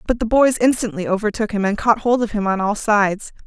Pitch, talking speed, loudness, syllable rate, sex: 215 Hz, 240 wpm, -18 LUFS, 5.9 syllables/s, female